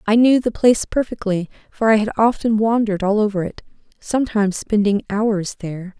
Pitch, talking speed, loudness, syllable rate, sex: 210 Hz, 170 wpm, -18 LUFS, 5.7 syllables/s, female